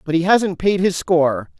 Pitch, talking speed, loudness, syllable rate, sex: 170 Hz, 225 wpm, -17 LUFS, 4.9 syllables/s, male